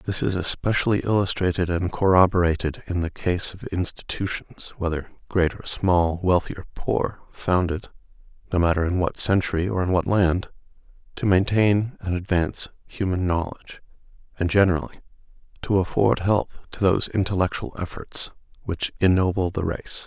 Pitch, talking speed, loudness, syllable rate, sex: 90 Hz, 140 wpm, -23 LUFS, 5.1 syllables/s, male